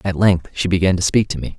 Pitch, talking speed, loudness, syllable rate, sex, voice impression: 95 Hz, 305 wpm, -17 LUFS, 6.3 syllables/s, male, masculine, adult-like, slightly middle-aged, thick, slightly relaxed, slightly weak, slightly bright, soft, slightly clear, slightly fluent, very cool, intellectual, refreshing, very sincere, very calm, mature, friendly, very reassuring, unique, very elegant, slightly wild, sweet, lively, very kind, slightly modest